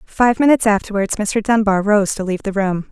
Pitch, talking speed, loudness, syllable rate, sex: 205 Hz, 205 wpm, -16 LUFS, 5.8 syllables/s, female